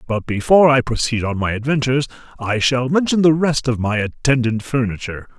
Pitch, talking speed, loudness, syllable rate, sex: 125 Hz, 180 wpm, -17 LUFS, 5.8 syllables/s, male